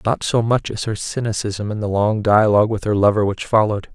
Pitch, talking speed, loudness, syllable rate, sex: 105 Hz, 245 wpm, -18 LUFS, 6.0 syllables/s, male